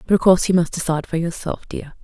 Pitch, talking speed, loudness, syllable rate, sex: 170 Hz, 265 wpm, -19 LUFS, 7.0 syllables/s, female